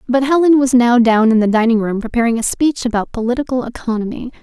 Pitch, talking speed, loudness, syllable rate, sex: 240 Hz, 205 wpm, -15 LUFS, 6.2 syllables/s, female